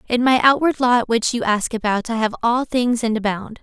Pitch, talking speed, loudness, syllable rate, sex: 235 Hz, 230 wpm, -18 LUFS, 5.1 syllables/s, female